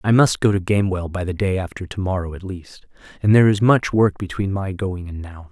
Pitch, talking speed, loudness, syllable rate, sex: 95 Hz, 250 wpm, -19 LUFS, 5.8 syllables/s, male